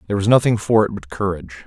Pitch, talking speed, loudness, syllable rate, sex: 100 Hz, 250 wpm, -18 LUFS, 7.4 syllables/s, male